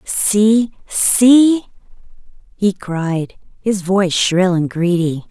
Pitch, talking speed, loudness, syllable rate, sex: 195 Hz, 100 wpm, -15 LUFS, 2.9 syllables/s, female